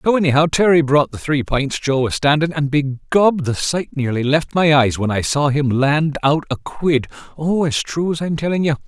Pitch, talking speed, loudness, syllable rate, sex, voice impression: 150 Hz, 225 wpm, -17 LUFS, 4.9 syllables/s, male, very masculine, very adult-like, very middle-aged, thick, very tensed, very powerful, very bright, slightly soft, very clear, very fluent, slightly raspy, cool, intellectual, very refreshing, sincere, slightly calm, mature, friendly, reassuring, very unique, slightly elegant, very wild, sweet, very lively, kind, very intense